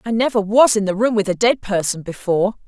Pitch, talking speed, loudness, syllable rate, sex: 210 Hz, 245 wpm, -17 LUFS, 6.1 syllables/s, female